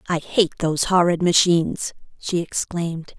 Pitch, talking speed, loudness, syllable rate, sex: 170 Hz, 130 wpm, -20 LUFS, 4.9 syllables/s, female